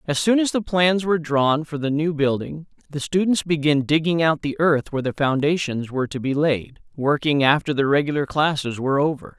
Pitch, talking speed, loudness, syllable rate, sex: 150 Hz, 205 wpm, -21 LUFS, 5.4 syllables/s, male